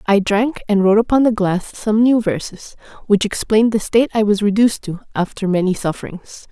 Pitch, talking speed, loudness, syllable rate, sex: 210 Hz, 195 wpm, -16 LUFS, 5.6 syllables/s, female